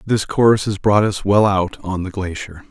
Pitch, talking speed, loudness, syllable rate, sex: 100 Hz, 220 wpm, -17 LUFS, 4.8 syllables/s, male